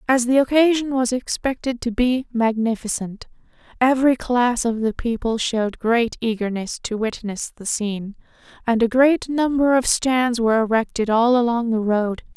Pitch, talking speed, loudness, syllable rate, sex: 240 Hz, 155 wpm, -20 LUFS, 4.8 syllables/s, female